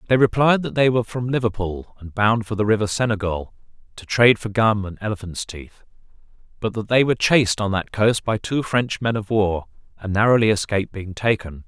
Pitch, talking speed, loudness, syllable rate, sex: 110 Hz, 200 wpm, -20 LUFS, 5.6 syllables/s, male